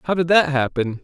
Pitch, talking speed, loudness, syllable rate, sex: 150 Hz, 230 wpm, -18 LUFS, 5.8 syllables/s, male